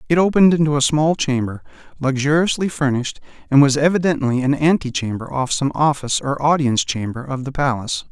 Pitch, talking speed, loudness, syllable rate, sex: 140 Hz, 170 wpm, -18 LUFS, 6.1 syllables/s, male